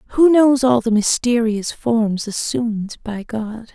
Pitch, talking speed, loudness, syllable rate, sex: 230 Hz, 145 wpm, -18 LUFS, 3.6 syllables/s, female